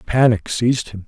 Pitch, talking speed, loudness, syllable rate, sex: 115 Hz, 170 wpm, -18 LUFS, 5.3 syllables/s, male